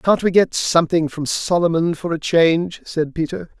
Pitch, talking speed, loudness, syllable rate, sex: 165 Hz, 185 wpm, -18 LUFS, 4.9 syllables/s, male